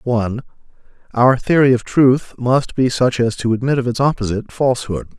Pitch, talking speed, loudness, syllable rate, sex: 125 Hz, 175 wpm, -16 LUFS, 5.7 syllables/s, male